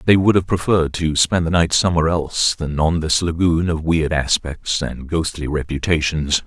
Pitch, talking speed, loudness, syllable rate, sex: 80 Hz, 185 wpm, -18 LUFS, 5.2 syllables/s, male